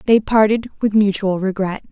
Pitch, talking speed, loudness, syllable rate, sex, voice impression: 205 Hz, 155 wpm, -17 LUFS, 5.0 syllables/s, female, very feminine, slightly young, slightly adult-like, very thin, slightly relaxed, slightly weak, bright, slightly soft, slightly clear, slightly fluent, cute, intellectual, refreshing, slightly sincere, very calm, friendly, reassuring, slightly unique, very elegant, slightly sweet, lively, kind, slightly modest